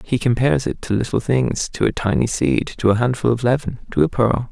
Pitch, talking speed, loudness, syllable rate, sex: 115 Hz, 240 wpm, -19 LUFS, 5.6 syllables/s, male